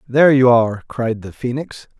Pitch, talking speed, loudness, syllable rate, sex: 125 Hz, 180 wpm, -16 LUFS, 5.3 syllables/s, male